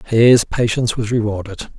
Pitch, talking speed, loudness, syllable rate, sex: 110 Hz, 135 wpm, -16 LUFS, 5.1 syllables/s, male